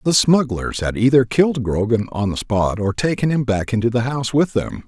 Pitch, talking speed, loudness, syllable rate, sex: 120 Hz, 220 wpm, -18 LUFS, 5.3 syllables/s, male